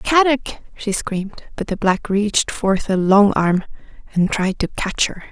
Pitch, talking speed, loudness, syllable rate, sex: 200 Hz, 180 wpm, -18 LUFS, 4.3 syllables/s, female